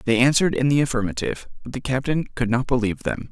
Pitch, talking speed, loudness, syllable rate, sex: 130 Hz, 215 wpm, -22 LUFS, 7.2 syllables/s, male